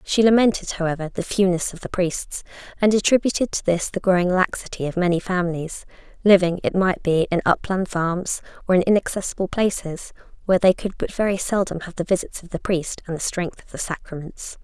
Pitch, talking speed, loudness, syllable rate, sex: 185 Hz, 190 wpm, -21 LUFS, 5.7 syllables/s, female